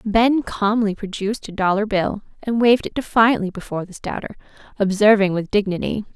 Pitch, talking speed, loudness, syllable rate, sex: 210 Hz, 155 wpm, -20 LUFS, 5.6 syllables/s, female